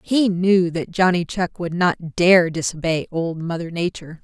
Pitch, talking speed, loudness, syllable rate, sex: 175 Hz, 170 wpm, -20 LUFS, 4.4 syllables/s, female